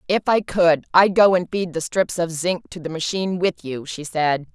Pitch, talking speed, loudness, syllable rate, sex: 175 Hz, 240 wpm, -20 LUFS, 4.8 syllables/s, female